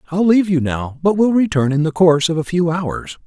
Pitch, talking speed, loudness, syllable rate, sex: 165 Hz, 255 wpm, -16 LUFS, 5.7 syllables/s, male